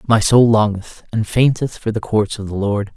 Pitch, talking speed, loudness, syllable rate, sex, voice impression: 110 Hz, 225 wpm, -17 LUFS, 4.7 syllables/s, male, masculine, adult-like, slightly weak, bright, clear, fluent, cool, refreshing, friendly, slightly wild, slightly lively, modest